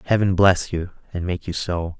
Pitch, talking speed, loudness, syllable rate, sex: 90 Hz, 210 wpm, -21 LUFS, 4.8 syllables/s, male